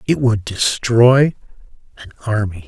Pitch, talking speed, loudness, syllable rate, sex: 115 Hz, 110 wpm, -16 LUFS, 4.3 syllables/s, male